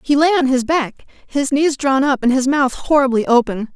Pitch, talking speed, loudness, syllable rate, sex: 270 Hz, 225 wpm, -16 LUFS, 4.9 syllables/s, female